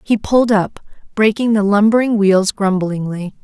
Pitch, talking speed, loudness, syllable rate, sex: 205 Hz, 140 wpm, -15 LUFS, 4.8 syllables/s, female